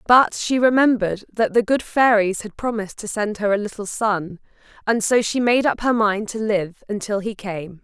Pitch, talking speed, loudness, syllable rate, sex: 215 Hz, 205 wpm, -20 LUFS, 4.9 syllables/s, female